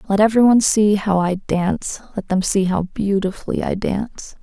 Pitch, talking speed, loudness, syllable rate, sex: 200 Hz, 190 wpm, -18 LUFS, 5.4 syllables/s, female